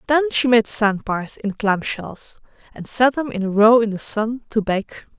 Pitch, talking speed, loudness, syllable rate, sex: 225 Hz, 220 wpm, -19 LUFS, 4.3 syllables/s, female